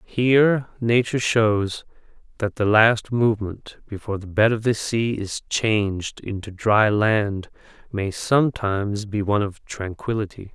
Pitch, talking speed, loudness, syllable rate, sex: 110 Hz, 135 wpm, -21 LUFS, 4.3 syllables/s, male